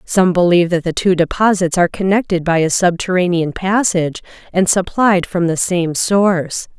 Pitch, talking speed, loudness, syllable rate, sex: 180 Hz, 160 wpm, -15 LUFS, 5.1 syllables/s, female